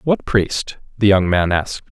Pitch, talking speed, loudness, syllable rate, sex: 105 Hz, 180 wpm, -17 LUFS, 4.4 syllables/s, male